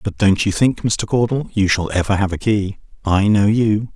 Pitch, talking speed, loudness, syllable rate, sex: 105 Hz, 230 wpm, -17 LUFS, 4.8 syllables/s, male